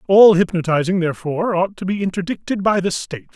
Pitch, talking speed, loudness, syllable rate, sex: 185 Hz, 180 wpm, -18 LUFS, 6.5 syllables/s, male